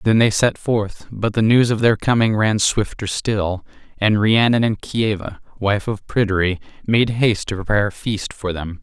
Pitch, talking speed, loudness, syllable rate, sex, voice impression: 105 Hz, 190 wpm, -19 LUFS, 4.7 syllables/s, male, masculine, middle-aged, tensed, powerful, hard, raspy, sincere, calm, mature, wild, strict